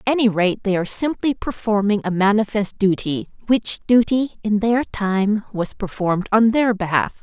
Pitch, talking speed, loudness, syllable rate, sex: 210 Hz, 165 wpm, -19 LUFS, 4.8 syllables/s, female